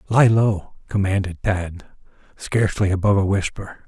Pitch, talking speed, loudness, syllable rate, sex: 100 Hz, 125 wpm, -20 LUFS, 4.8 syllables/s, male